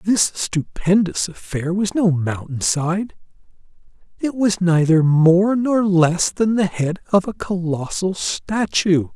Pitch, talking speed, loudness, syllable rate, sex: 180 Hz, 125 wpm, -19 LUFS, 3.7 syllables/s, male